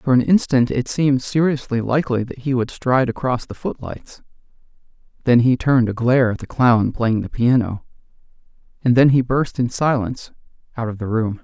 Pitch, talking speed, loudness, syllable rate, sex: 125 Hz, 185 wpm, -18 LUFS, 5.5 syllables/s, male